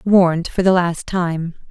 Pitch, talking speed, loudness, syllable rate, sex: 175 Hz, 175 wpm, -18 LUFS, 4.1 syllables/s, female